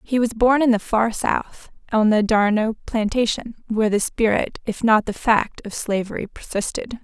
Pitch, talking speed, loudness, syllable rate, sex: 220 Hz, 180 wpm, -20 LUFS, 4.5 syllables/s, female